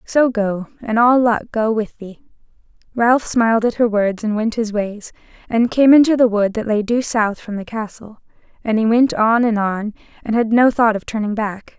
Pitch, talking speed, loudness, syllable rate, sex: 225 Hz, 215 wpm, -17 LUFS, 4.7 syllables/s, female